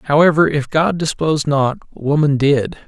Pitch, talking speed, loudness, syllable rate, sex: 150 Hz, 145 wpm, -16 LUFS, 4.6 syllables/s, male